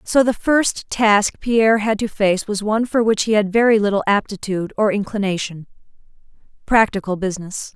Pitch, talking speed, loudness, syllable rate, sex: 210 Hz, 155 wpm, -18 LUFS, 5.3 syllables/s, female